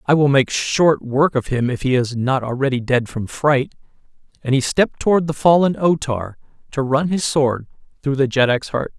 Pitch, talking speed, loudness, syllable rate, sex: 135 Hz, 205 wpm, -18 LUFS, 4.9 syllables/s, male